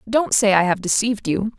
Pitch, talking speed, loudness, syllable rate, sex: 210 Hz, 225 wpm, -18 LUFS, 5.5 syllables/s, female